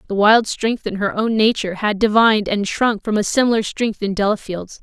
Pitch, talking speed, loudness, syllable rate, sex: 210 Hz, 210 wpm, -18 LUFS, 5.4 syllables/s, female